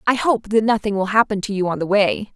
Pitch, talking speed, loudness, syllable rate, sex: 205 Hz, 280 wpm, -19 LUFS, 5.9 syllables/s, female